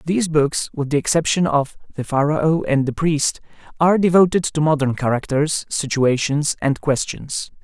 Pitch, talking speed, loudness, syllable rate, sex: 150 Hz, 150 wpm, -19 LUFS, 4.8 syllables/s, male